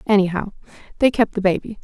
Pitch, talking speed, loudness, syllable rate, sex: 205 Hz, 165 wpm, -19 LUFS, 6.6 syllables/s, female